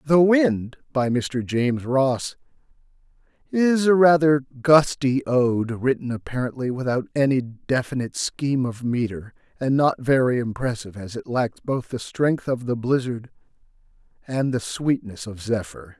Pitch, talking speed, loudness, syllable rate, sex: 130 Hz, 140 wpm, -22 LUFS, 4.6 syllables/s, male